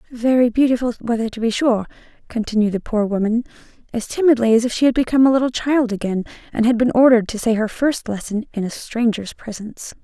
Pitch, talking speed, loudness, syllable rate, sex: 235 Hz, 205 wpm, -18 LUFS, 6.3 syllables/s, female